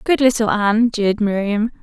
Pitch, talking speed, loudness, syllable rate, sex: 220 Hz, 165 wpm, -17 LUFS, 5.6 syllables/s, female